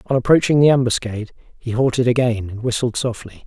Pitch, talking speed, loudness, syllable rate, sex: 120 Hz, 175 wpm, -18 LUFS, 6.2 syllables/s, male